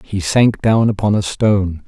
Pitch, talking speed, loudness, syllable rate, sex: 100 Hz, 195 wpm, -15 LUFS, 4.6 syllables/s, male